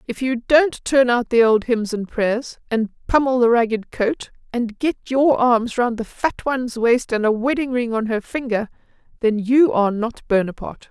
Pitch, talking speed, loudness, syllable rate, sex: 240 Hz, 200 wpm, -19 LUFS, 4.7 syllables/s, female